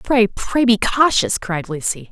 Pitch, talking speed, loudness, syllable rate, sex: 220 Hz, 170 wpm, -17 LUFS, 4.0 syllables/s, female